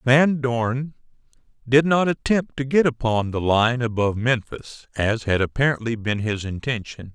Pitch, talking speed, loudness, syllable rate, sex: 125 Hz, 150 wpm, -21 LUFS, 4.5 syllables/s, male